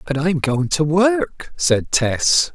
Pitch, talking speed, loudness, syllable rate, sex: 155 Hz, 190 wpm, -18 LUFS, 3.4 syllables/s, male